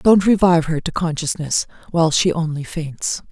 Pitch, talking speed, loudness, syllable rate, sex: 165 Hz, 165 wpm, -19 LUFS, 5.2 syllables/s, female